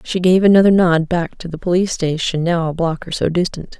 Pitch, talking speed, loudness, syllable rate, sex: 175 Hz, 235 wpm, -16 LUFS, 5.7 syllables/s, female